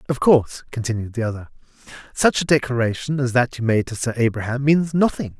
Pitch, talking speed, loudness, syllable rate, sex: 130 Hz, 190 wpm, -20 LUFS, 6.0 syllables/s, male